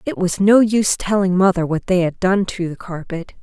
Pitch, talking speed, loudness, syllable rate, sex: 185 Hz, 230 wpm, -17 LUFS, 5.2 syllables/s, female